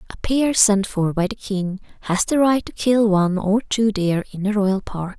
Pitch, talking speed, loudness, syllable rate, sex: 205 Hz, 230 wpm, -19 LUFS, 4.6 syllables/s, female